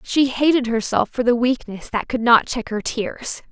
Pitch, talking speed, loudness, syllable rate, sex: 240 Hz, 205 wpm, -20 LUFS, 4.5 syllables/s, female